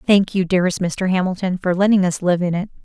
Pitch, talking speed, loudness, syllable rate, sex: 185 Hz, 230 wpm, -18 LUFS, 6.2 syllables/s, female